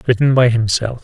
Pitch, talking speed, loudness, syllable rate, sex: 120 Hz, 175 wpm, -14 LUFS, 5.6 syllables/s, male